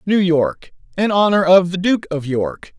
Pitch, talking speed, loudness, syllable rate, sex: 180 Hz, 170 wpm, -16 LUFS, 4.2 syllables/s, male